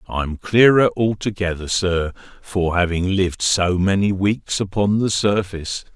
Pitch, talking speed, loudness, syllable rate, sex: 95 Hz, 130 wpm, -19 LUFS, 4.3 syllables/s, male